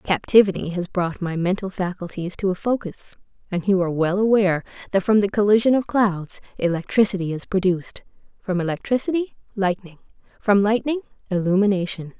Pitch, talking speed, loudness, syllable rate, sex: 195 Hz, 140 wpm, -21 LUFS, 5.7 syllables/s, female